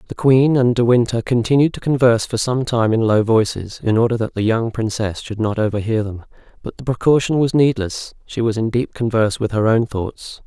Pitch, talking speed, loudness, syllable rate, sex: 115 Hz, 220 wpm, -18 LUFS, 5.4 syllables/s, male